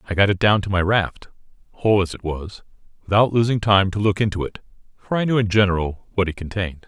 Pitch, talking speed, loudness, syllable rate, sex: 100 Hz, 225 wpm, -20 LUFS, 6.3 syllables/s, male